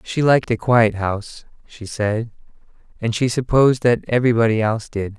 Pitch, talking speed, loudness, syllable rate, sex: 115 Hz, 160 wpm, -18 LUFS, 5.5 syllables/s, male